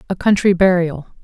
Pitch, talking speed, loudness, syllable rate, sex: 180 Hz, 145 wpm, -15 LUFS, 5.5 syllables/s, female